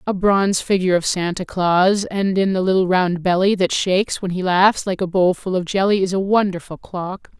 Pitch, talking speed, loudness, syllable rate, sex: 185 Hz, 220 wpm, -18 LUFS, 5.2 syllables/s, female